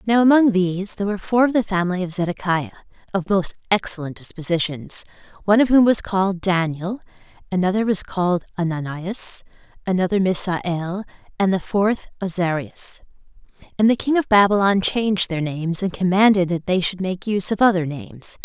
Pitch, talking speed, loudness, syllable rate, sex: 190 Hz, 160 wpm, -20 LUFS, 5.5 syllables/s, female